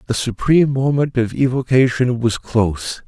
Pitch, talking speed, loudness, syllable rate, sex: 125 Hz, 135 wpm, -17 LUFS, 4.9 syllables/s, male